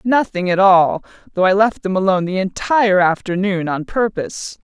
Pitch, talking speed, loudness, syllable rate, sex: 190 Hz, 155 wpm, -16 LUFS, 5.2 syllables/s, female